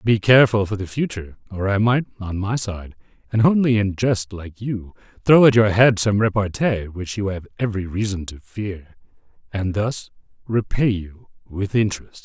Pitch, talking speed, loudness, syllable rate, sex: 105 Hz, 175 wpm, -20 LUFS, 5.0 syllables/s, male